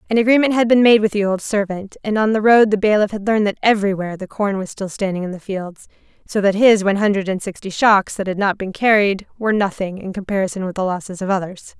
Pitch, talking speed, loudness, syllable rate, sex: 200 Hz, 250 wpm, -18 LUFS, 6.4 syllables/s, female